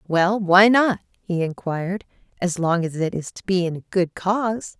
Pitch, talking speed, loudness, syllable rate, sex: 185 Hz, 200 wpm, -21 LUFS, 4.7 syllables/s, female